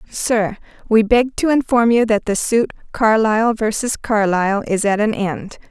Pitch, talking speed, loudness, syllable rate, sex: 220 Hz, 160 wpm, -17 LUFS, 4.3 syllables/s, female